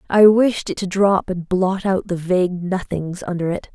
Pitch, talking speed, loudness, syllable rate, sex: 185 Hz, 210 wpm, -19 LUFS, 4.5 syllables/s, female